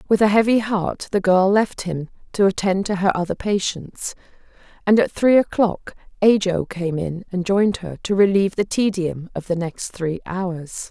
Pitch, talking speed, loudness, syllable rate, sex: 190 Hz, 180 wpm, -20 LUFS, 4.6 syllables/s, female